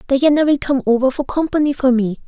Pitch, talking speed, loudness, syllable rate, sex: 270 Hz, 210 wpm, -16 LUFS, 6.0 syllables/s, female